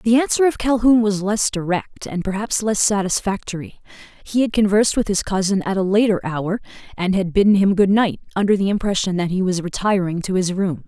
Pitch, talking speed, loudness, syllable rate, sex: 200 Hz, 205 wpm, -19 LUFS, 5.6 syllables/s, female